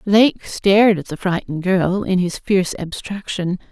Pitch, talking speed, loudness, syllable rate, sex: 185 Hz, 160 wpm, -18 LUFS, 4.6 syllables/s, female